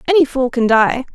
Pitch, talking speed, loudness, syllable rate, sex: 260 Hz, 210 wpm, -15 LUFS, 5.5 syllables/s, female